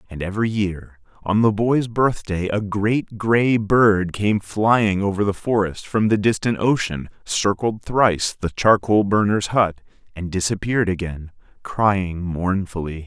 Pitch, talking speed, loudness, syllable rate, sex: 100 Hz, 140 wpm, -20 LUFS, 4.1 syllables/s, male